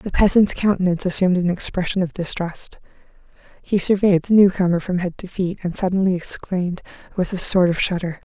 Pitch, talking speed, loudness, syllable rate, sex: 185 Hz, 175 wpm, -19 LUFS, 5.9 syllables/s, female